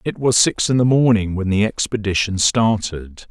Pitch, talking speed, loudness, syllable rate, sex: 105 Hz, 180 wpm, -17 LUFS, 4.7 syllables/s, male